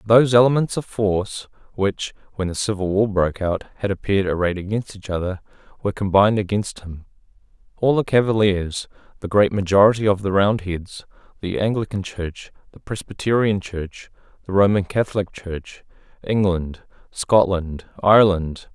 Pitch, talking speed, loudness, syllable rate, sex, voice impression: 100 Hz, 140 wpm, -20 LUFS, 5.2 syllables/s, male, masculine, adult-like, cool, intellectual, slightly calm